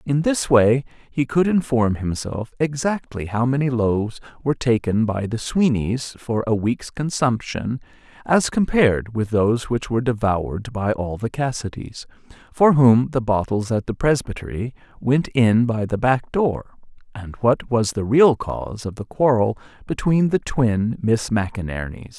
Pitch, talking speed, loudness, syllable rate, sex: 120 Hz, 155 wpm, -21 LUFS, 4.5 syllables/s, male